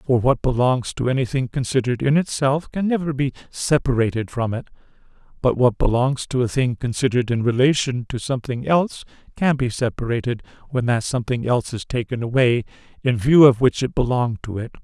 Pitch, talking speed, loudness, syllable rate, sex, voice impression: 125 Hz, 180 wpm, -20 LUFS, 5.8 syllables/s, male, very masculine, very adult-like, slightly thick, slightly sincere, slightly calm, friendly